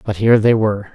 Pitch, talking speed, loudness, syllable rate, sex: 105 Hz, 255 wpm, -15 LUFS, 7.1 syllables/s, male